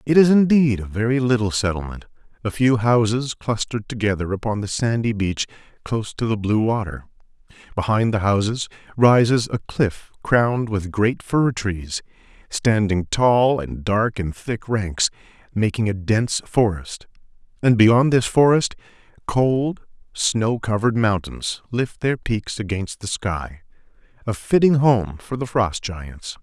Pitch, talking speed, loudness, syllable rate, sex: 110 Hz, 140 wpm, -20 LUFS, 4.3 syllables/s, male